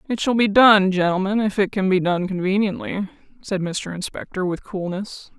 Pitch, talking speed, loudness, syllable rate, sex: 195 Hz, 180 wpm, -20 LUFS, 4.9 syllables/s, female